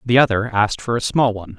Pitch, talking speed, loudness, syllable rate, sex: 110 Hz, 265 wpm, -18 LUFS, 6.7 syllables/s, male